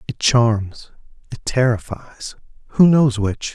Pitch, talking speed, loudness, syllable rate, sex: 120 Hz, 120 wpm, -18 LUFS, 3.5 syllables/s, male